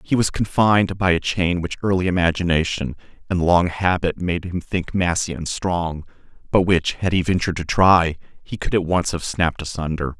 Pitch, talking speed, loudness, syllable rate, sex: 90 Hz, 190 wpm, -20 LUFS, 5.0 syllables/s, male